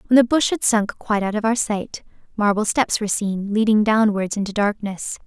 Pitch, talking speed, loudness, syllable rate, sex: 215 Hz, 205 wpm, -20 LUFS, 5.3 syllables/s, female